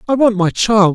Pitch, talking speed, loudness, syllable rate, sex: 210 Hz, 255 wpm, -13 LUFS, 4.8 syllables/s, male